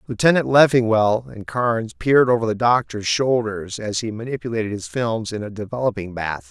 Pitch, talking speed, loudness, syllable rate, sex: 115 Hz, 165 wpm, -20 LUFS, 5.4 syllables/s, male